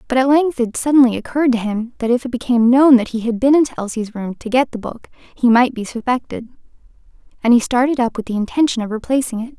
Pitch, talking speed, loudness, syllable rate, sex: 245 Hz, 240 wpm, -16 LUFS, 6.4 syllables/s, female